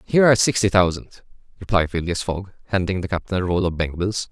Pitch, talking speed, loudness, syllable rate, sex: 95 Hz, 210 wpm, -21 LUFS, 6.6 syllables/s, male